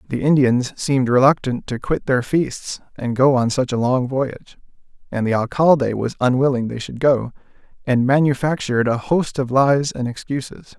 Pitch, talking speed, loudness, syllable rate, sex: 130 Hz, 175 wpm, -19 LUFS, 4.9 syllables/s, male